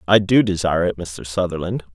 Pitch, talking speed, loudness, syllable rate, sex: 90 Hz, 185 wpm, -20 LUFS, 5.9 syllables/s, male